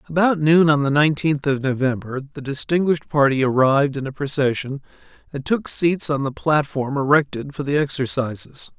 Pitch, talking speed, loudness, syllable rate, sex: 145 Hz, 165 wpm, -20 LUFS, 5.4 syllables/s, male